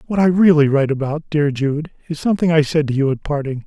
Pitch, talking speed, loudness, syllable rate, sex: 150 Hz, 245 wpm, -17 LUFS, 6.4 syllables/s, male